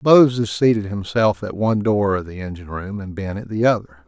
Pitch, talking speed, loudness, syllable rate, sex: 105 Hz, 220 wpm, -20 LUFS, 5.8 syllables/s, male